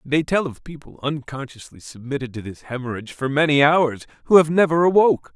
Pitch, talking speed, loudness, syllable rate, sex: 145 Hz, 180 wpm, -19 LUFS, 5.8 syllables/s, male